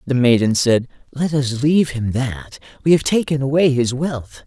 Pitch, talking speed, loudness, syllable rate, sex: 130 Hz, 190 wpm, -18 LUFS, 4.7 syllables/s, male